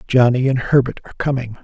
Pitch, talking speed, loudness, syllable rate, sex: 125 Hz, 185 wpm, -17 LUFS, 6.6 syllables/s, male